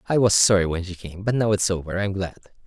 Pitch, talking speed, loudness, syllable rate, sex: 95 Hz, 270 wpm, -22 LUFS, 6.4 syllables/s, male